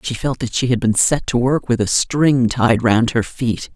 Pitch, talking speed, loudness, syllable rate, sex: 120 Hz, 255 wpm, -17 LUFS, 4.4 syllables/s, female